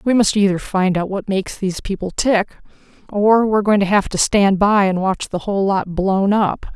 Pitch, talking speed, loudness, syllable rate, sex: 195 Hz, 220 wpm, -17 LUFS, 5.3 syllables/s, female